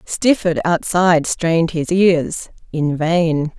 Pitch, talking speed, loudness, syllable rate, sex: 170 Hz, 100 wpm, -17 LUFS, 3.5 syllables/s, female